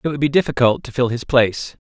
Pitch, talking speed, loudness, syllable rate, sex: 130 Hz, 255 wpm, -18 LUFS, 6.5 syllables/s, male